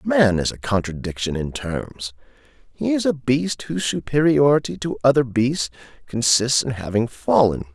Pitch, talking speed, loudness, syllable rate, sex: 125 Hz, 145 wpm, -20 LUFS, 4.6 syllables/s, male